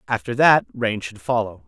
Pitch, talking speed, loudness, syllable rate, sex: 110 Hz, 180 wpm, -20 LUFS, 4.9 syllables/s, male